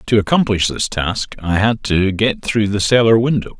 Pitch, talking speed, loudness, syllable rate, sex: 105 Hz, 200 wpm, -16 LUFS, 4.7 syllables/s, male